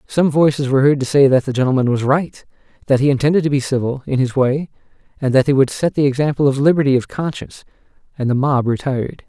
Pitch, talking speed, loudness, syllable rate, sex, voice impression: 135 Hz, 220 wpm, -16 LUFS, 6.6 syllables/s, male, very masculine, very adult-like, middle-aged, thick, slightly tensed, slightly powerful, slightly bright, slightly soft, slightly muffled, fluent, cool, very intellectual, refreshing, sincere, slightly calm, friendly, reassuring, slightly unique, slightly elegant, wild, slightly sweet, lively, kind, slightly modest